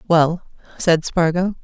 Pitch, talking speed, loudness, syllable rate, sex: 170 Hz, 110 wpm, -18 LUFS, 3.9 syllables/s, female